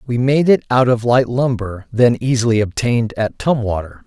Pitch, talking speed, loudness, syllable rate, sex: 120 Hz, 175 wpm, -16 LUFS, 5.1 syllables/s, male